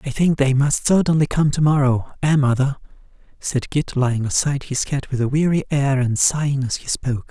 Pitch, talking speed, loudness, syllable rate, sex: 140 Hz, 205 wpm, -19 LUFS, 5.3 syllables/s, male